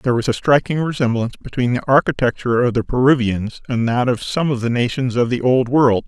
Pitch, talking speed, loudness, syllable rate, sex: 125 Hz, 215 wpm, -18 LUFS, 6.0 syllables/s, male